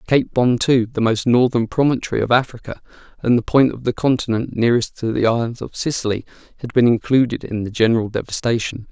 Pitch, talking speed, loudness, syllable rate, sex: 120 Hz, 190 wpm, -18 LUFS, 6.0 syllables/s, male